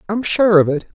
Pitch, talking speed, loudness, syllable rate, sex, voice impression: 195 Hz, 240 wpm, -15 LUFS, 5.5 syllables/s, male, masculine, adult-like, slightly cool, sincere, calm, slightly sweet, kind